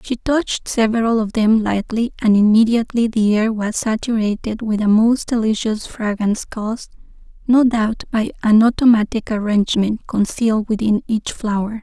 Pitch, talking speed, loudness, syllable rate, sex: 220 Hz, 140 wpm, -17 LUFS, 5.0 syllables/s, female